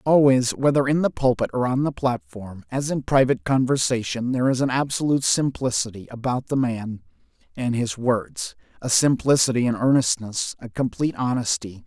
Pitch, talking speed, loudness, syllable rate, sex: 130 Hz, 155 wpm, -22 LUFS, 5.3 syllables/s, male